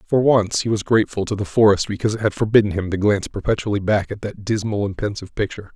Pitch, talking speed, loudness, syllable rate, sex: 105 Hz, 240 wpm, -20 LUFS, 7.0 syllables/s, male